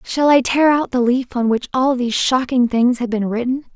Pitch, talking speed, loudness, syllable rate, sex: 250 Hz, 240 wpm, -17 LUFS, 5.1 syllables/s, female